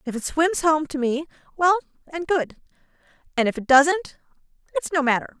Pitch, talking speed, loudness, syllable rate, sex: 305 Hz, 180 wpm, -22 LUFS, 5.2 syllables/s, female